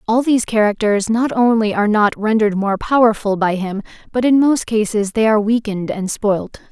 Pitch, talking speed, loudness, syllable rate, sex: 215 Hz, 190 wpm, -16 LUFS, 5.5 syllables/s, female